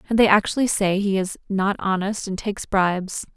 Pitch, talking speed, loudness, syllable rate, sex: 195 Hz, 195 wpm, -21 LUFS, 5.4 syllables/s, female